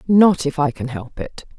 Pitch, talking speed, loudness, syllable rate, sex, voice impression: 155 Hz, 225 wpm, -18 LUFS, 4.5 syllables/s, female, feminine, adult-like, tensed, powerful, soft, raspy, intellectual, calm, reassuring, elegant, slightly strict